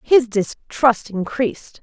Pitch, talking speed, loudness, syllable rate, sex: 230 Hz, 100 wpm, -19 LUFS, 3.5 syllables/s, female